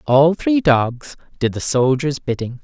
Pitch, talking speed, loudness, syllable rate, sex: 140 Hz, 160 wpm, -17 LUFS, 3.9 syllables/s, male